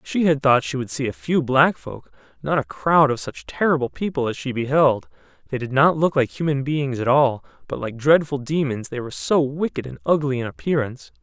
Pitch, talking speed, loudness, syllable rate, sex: 135 Hz, 220 wpm, -21 LUFS, 5.4 syllables/s, male